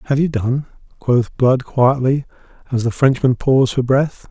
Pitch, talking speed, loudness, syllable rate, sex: 130 Hz, 165 wpm, -17 LUFS, 4.5 syllables/s, male